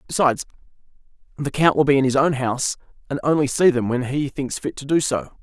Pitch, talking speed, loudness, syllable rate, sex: 140 Hz, 220 wpm, -20 LUFS, 6.0 syllables/s, male